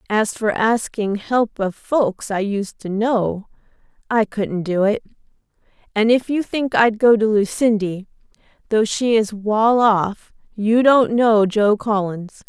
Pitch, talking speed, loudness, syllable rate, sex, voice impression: 215 Hz, 155 wpm, -18 LUFS, 3.7 syllables/s, female, feminine, adult-like, tensed, powerful, clear, fluent, intellectual, elegant, lively, intense, sharp